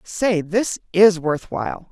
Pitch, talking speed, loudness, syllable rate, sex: 185 Hz, 155 wpm, -19 LUFS, 3.6 syllables/s, female